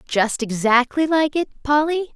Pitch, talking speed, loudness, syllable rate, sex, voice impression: 280 Hz, 140 wpm, -19 LUFS, 4.5 syllables/s, female, very feminine, slightly young, thin, tensed, slightly powerful, very bright, slightly soft, very clear, very fluent, very cute, intellectual, very refreshing, sincere, slightly calm, very friendly, very unique, elegant, slightly wild, sweet, lively, kind, slightly intense, slightly light